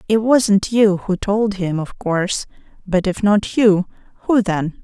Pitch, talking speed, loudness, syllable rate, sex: 200 Hz, 175 wpm, -17 LUFS, 3.9 syllables/s, female